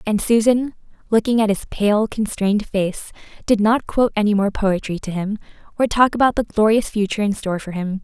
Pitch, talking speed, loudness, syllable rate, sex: 210 Hz, 195 wpm, -19 LUFS, 5.6 syllables/s, female